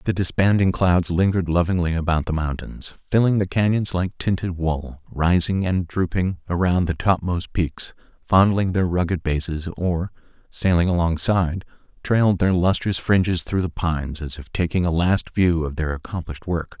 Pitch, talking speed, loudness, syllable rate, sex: 90 Hz, 160 wpm, -21 LUFS, 4.9 syllables/s, male